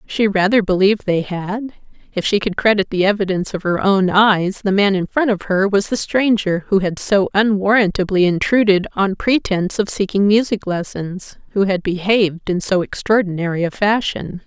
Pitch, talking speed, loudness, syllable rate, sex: 195 Hz, 170 wpm, -17 LUFS, 5.1 syllables/s, female